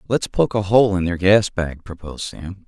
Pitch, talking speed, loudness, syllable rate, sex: 95 Hz, 225 wpm, -19 LUFS, 4.8 syllables/s, male